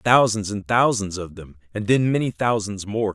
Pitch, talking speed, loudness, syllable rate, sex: 105 Hz, 190 wpm, -21 LUFS, 4.8 syllables/s, male